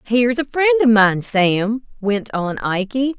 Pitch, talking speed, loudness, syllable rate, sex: 230 Hz, 170 wpm, -17 LUFS, 3.9 syllables/s, female